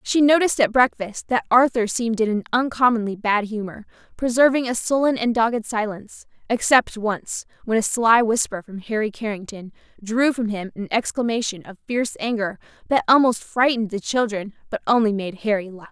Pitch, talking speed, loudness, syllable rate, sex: 225 Hz, 170 wpm, -21 LUFS, 5.5 syllables/s, female